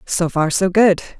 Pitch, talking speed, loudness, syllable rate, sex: 180 Hz, 200 wpm, -16 LUFS, 4.3 syllables/s, female